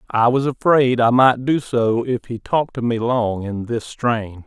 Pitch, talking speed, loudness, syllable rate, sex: 120 Hz, 215 wpm, -18 LUFS, 4.2 syllables/s, male